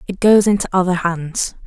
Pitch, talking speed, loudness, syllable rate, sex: 185 Hz, 180 wpm, -16 LUFS, 5.1 syllables/s, female